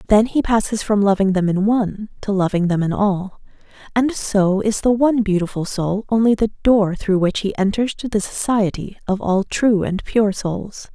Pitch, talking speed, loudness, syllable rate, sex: 205 Hz, 195 wpm, -18 LUFS, 4.7 syllables/s, female